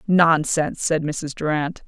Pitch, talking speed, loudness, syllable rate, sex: 155 Hz, 130 wpm, -21 LUFS, 4.2 syllables/s, female